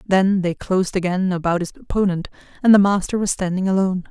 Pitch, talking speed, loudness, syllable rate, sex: 185 Hz, 190 wpm, -19 LUFS, 6.3 syllables/s, female